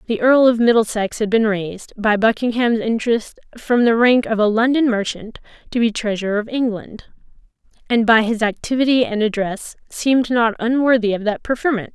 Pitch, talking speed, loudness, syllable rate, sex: 225 Hz, 170 wpm, -17 LUFS, 5.3 syllables/s, female